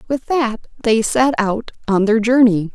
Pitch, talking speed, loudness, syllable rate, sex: 230 Hz, 175 wpm, -16 LUFS, 4.0 syllables/s, female